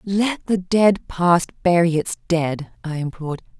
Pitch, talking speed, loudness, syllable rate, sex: 175 Hz, 150 wpm, -20 LUFS, 3.9 syllables/s, female